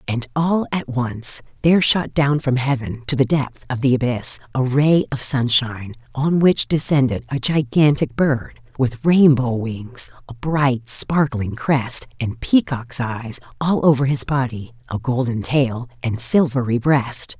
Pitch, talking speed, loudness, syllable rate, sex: 130 Hz, 155 wpm, -19 LUFS, 4.0 syllables/s, female